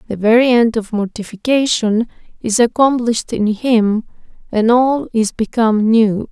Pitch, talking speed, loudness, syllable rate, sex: 225 Hz, 135 wpm, -15 LUFS, 4.5 syllables/s, female